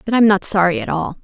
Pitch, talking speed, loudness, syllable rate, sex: 200 Hz, 290 wpm, -16 LUFS, 6.5 syllables/s, female